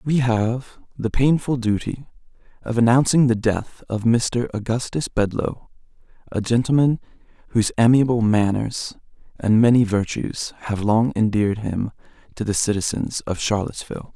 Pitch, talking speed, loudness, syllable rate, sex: 115 Hz, 125 wpm, -21 LUFS, 4.8 syllables/s, male